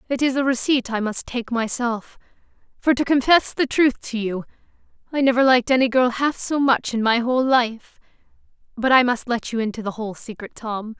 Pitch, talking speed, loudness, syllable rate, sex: 245 Hz, 195 wpm, -20 LUFS, 5.4 syllables/s, female